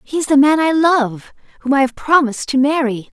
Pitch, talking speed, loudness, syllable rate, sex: 275 Hz, 205 wpm, -15 LUFS, 5.4 syllables/s, female